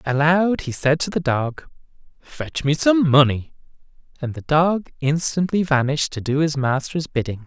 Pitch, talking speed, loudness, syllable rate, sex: 150 Hz, 160 wpm, -20 LUFS, 4.6 syllables/s, male